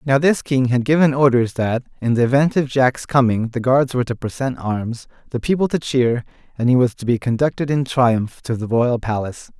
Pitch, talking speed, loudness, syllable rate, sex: 125 Hz, 220 wpm, -18 LUFS, 5.3 syllables/s, male